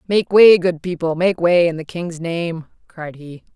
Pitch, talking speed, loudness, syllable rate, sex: 170 Hz, 185 wpm, -16 LUFS, 4.2 syllables/s, female